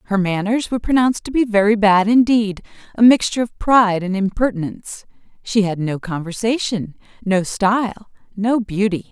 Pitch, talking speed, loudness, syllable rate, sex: 210 Hz, 150 wpm, -17 LUFS, 5.4 syllables/s, female